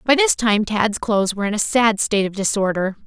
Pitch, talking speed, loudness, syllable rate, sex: 215 Hz, 235 wpm, -18 LUFS, 5.9 syllables/s, female